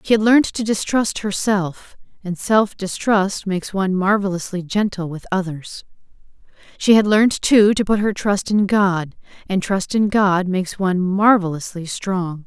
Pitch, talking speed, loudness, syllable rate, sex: 195 Hz, 160 wpm, -18 LUFS, 4.4 syllables/s, female